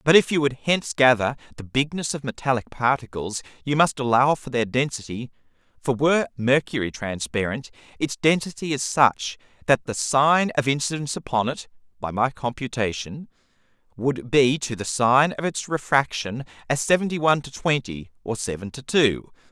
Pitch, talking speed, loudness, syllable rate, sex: 130 Hz, 160 wpm, -23 LUFS, 5.0 syllables/s, male